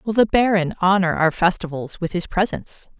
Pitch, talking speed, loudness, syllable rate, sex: 185 Hz, 180 wpm, -20 LUFS, 5.4 syllables/s, female